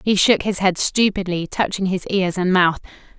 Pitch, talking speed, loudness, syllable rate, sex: 185 Hz, 190 wpm, -19 LUFS, 4.9 syllables/s, female